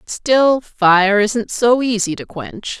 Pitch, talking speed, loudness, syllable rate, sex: 215 Hz, 150 wpm, -15 LUFS, 3.0 syllables/s, female